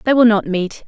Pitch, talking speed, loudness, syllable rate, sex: 220 Hz, 275 wpm, -15 LUFS, 5.3 syllables/s, female